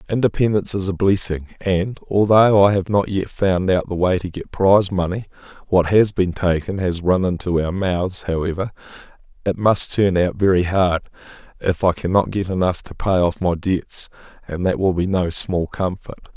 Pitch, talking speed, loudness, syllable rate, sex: 95 Hz, 180 wpm, -19 LUFS, 4.9 syllables/s, male